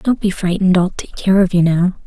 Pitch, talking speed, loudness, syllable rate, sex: 185 Hz, 230 wpm, -15 LUFS, 5.6 syllables/s, female